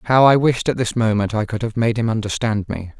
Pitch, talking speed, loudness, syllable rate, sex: 115 Hz, 260 wpm, -19 LUFS, 5.8 syllables/s, male